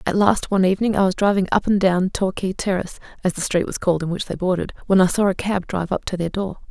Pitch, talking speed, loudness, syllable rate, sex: 190 Hz, 280 wpm, -20 LUFS, 6.8 syllables/s, female